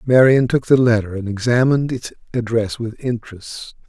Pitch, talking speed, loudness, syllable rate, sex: 120 Hz, 155 wpm, -18 LUFS, 5.2 syllables/s, male